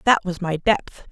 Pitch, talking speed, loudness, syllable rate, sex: 185 Hz, 215 wpm, -21 LUFS, 4.5 syllables/s, female